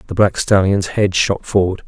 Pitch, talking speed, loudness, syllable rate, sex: 95 Hz, 190 wpm, -16 LUFS, 4.7 syllables/s, male